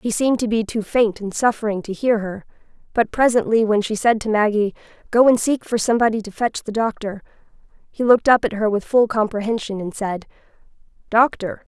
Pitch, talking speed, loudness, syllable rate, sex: 220 Hz, 195 wpm, -19 LUFS, 5.7 syllables/s, female